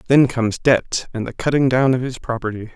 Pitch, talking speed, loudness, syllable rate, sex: 125 Hz, 220 wpm, -19 LUFS, 5.6 syllables/s, male